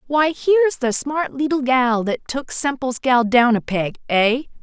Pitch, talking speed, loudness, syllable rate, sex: 260 Hz, 180 wpm, -19 LUFS, 4.4 syllables/s, female